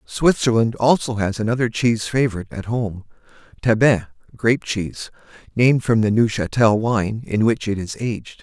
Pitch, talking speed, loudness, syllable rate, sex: 110 Hz, 140 wpm, -19 LUFS, 5.2 syllables/s, male